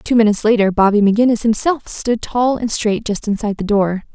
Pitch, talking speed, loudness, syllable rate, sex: 220 Hz, 205 wpm, -16 LUFS, 6.0 syllables/s, female